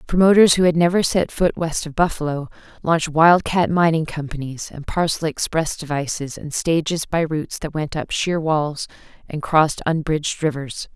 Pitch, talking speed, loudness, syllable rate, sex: 160 Hz, 170 wpm, -20 LUFS, 5.0 syllables/s, female